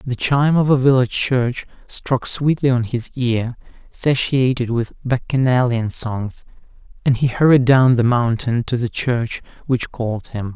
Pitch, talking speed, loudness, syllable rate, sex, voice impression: 125 Hz, 155 wpm, -18 LUFS, 4.4 syllables/s, male, masculine, adult-like, tensed, slightly weak, clear, slightly halting, slightly cool, calm, reassuring, lively, kind, slightly modest